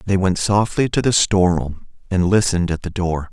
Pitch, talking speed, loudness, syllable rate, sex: 95 Hz, 200 wpm, -18 LUFS, 5.4 syllables/s, male